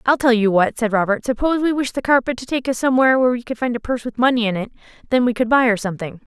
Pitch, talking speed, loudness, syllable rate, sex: 240 Hz, 285 wpm, -18 LUFS, 7.5 syllables/s, female